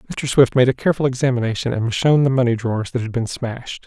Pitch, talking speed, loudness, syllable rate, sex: 125 Hz, 250 wpm, -18 LUFS, 6.8 syllables/s, male